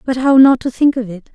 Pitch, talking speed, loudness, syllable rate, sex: 250 Hz, 310 wpm, -12 LUFS, 5.6 syllables/s, female